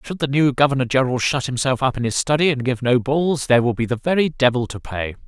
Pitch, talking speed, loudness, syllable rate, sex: 130 Hz, 260 wpm, -19 LUFS, 6.3 syllables/s, male